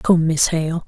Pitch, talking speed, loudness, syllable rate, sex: 165 Hz, 205 wpm, -18 LUFS, 3.7 syllables/s, female